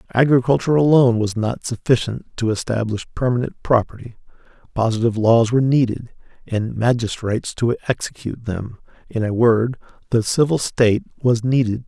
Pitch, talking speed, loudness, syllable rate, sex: 120 Hz, 130 wpm, -19 LUFS, 5.6 syllables/s, male